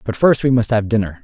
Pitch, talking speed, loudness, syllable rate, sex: 115 Hz, 290 wpm, -16 LUFS, 6.2 syllables/s, male